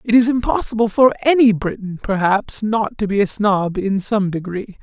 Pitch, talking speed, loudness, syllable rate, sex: 210 Hz, 185 wpm, -17 LUFS, 4.8 syllables/s, male